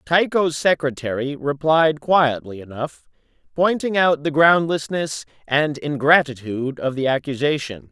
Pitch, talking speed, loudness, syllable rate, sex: 150 Hz, 105 wpm, -20 LUFS, 4.3 syllables/s, male